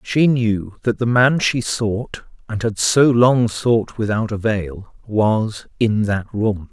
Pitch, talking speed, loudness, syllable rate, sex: 110 Hz, 160 wpm, -18 LUFS, 3.3 syllables/s, male